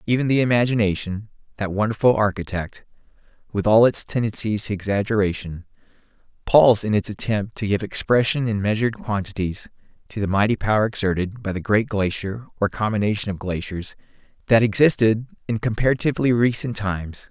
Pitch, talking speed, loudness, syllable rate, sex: 105 Hz, 140 wpm, -21 LUFS, 5.7 syllables/s, male